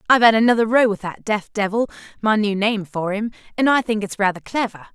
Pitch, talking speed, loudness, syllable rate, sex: 210 Hz, 220 wpm, -19 LUFS, 6.2 syllables/s, female